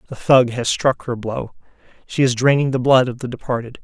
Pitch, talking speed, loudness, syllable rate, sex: 125 Hz, 220 wpm, -18 LUFS, 5.5 syllables/s, male